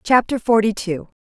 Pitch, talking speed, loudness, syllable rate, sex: 215 Hz, 145 wpm, -18 LUFS, 5.0 syllables/s, female